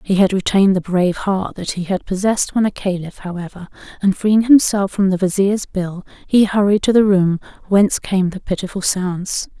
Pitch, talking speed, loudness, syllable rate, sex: 190 Hz, 195 wpm, -17 LUFS, 5.2 syllables/s, female